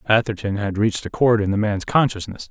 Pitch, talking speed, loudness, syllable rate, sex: 105 Hz, 215 wpm, -20 LUFS, 5.9 syllables/s, male